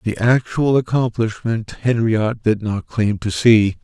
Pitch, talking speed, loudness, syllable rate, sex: 110 Hz, 140 wpm, -18 LUFS, 3.8 syllables/s, male